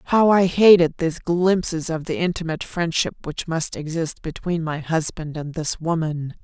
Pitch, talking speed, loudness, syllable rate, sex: 165 Hz, 170 wpm, -21 LUFS, 4.8 syllables/s, female